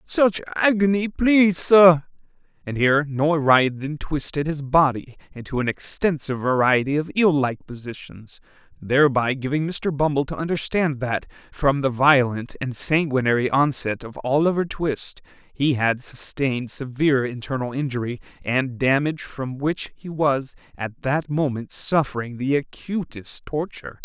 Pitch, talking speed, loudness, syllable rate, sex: 140 Hz, 135 wpm, -22 LUFS, 4.7 syllables/s, male